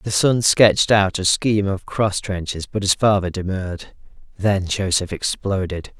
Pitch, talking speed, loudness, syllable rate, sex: 100 Hz, 150 wpm, -19 LUFS, 4.5 syllables/s, male